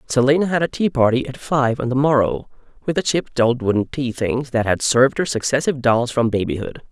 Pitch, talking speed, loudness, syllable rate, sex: 130 Hz, 215 wpm, -19 LUFS, 5.8 syllables/s, male